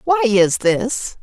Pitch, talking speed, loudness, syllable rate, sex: 235 Hz, 145 wpm, -16 LUFS, 2.9 syllables/s, female